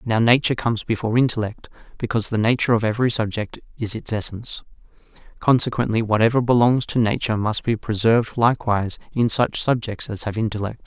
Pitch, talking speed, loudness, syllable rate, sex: 115 Hz, 160 wpm, -21 LUFS, 6.5 syllables/s, male